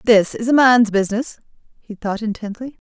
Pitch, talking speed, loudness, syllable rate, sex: 225 Hz, 170 wpm, -17 LUFS, 5.2 syllables/s, female